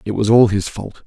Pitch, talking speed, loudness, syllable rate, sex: 105 Hz, 280 wpm, -15 LUFS, 5.4 syllables/s, male